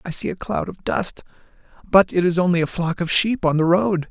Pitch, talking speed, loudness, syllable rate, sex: 165 Hz, 250 wpm, -20 LUFS, 5.3 syllables/s, male